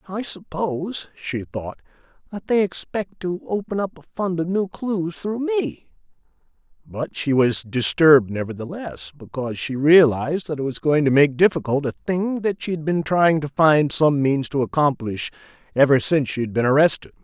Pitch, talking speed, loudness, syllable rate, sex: 155 Hz, 180 wpm, -21 LUFS, 5.0 syllables/s, male